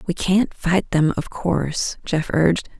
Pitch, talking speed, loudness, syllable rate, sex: 175 Hz, 170 wpm, -20 LUFS, 4.1 syllables/s, female